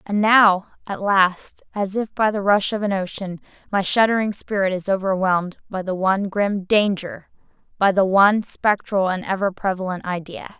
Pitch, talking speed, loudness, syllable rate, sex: 195 Hz, 165 wpm, -20 LUFS, 4.9 syllables/s, female